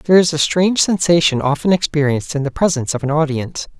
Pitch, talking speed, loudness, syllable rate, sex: 155 Hz, 205 wpm, -16 LUFS, 6.8 syllables/s, male